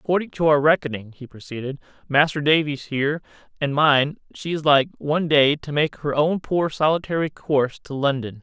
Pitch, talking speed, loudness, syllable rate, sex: 150 Hz, 180 wpm, -21 LUFS, 5.3 syllables/s, male